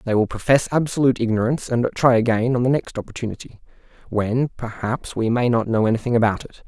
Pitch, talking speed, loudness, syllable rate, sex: 120 Hz, 190 wpm, -20 LUFS, 6.2 syllables/s, male